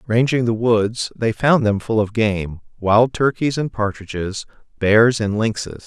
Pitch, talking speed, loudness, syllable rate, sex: 115 Hz, 165 wpm, -18 LUFS, 4.0 syllables/s, male